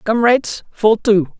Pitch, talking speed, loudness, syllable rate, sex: 220 Hz, 130 wpm, -15 LUFS, 4.1 syllables/s, female